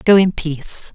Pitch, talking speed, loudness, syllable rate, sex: 170 Hz, 190 wpm, -17 LUFS, 4.4 syllables/s, female